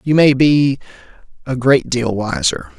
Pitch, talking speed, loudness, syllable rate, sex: 125 Hz, 130 wpm, -15 LUFS, 4.0 syllables/s, male